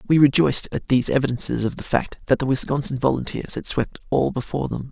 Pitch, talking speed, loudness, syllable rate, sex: 130 Hz, 210 wpm, -22 LUFS, 6.4 syllables/s, male